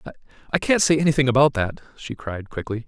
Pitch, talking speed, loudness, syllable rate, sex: 130 Hz, 190 wpm, -21 LUFS, 6.5 syllables/s, male